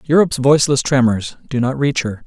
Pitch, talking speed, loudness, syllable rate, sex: 130 Hz, 185 wpm, -16 LUFS, 5.8 syllables/s, male